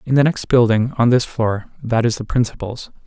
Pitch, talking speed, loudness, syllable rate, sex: 120 Hz, 195 wpm, -18 LUFS, 5.3 syllables/s, male